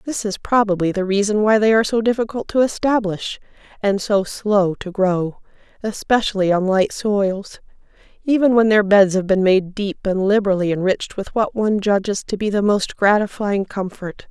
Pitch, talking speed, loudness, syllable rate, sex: 205 Hz, 175 wpm, -18 LUFS, 5.0 syllables/s, female